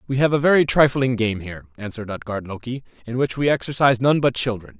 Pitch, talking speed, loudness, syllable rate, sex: 125 Hz, 215 wpm, -20 LUFS, 6.6 syllables/s, male